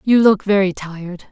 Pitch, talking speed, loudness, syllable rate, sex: 195 Hz, 185 wpm, -15 LUFS, 5.0 syllables/s, female